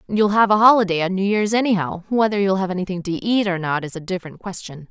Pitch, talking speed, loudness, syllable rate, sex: 195 Hz, 245 wpm, -19 LUFS, 6.4 syllables/s, female